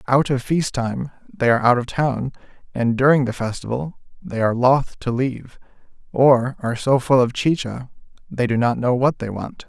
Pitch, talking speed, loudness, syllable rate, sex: 125 Hz, 190 wpm, -20 LUFS, 5.0 syllables/s, male